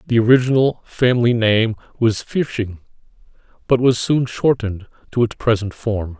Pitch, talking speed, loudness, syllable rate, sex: 115 Hz, 135 wpm, -18 LUFS, 4.9 syllables/s, male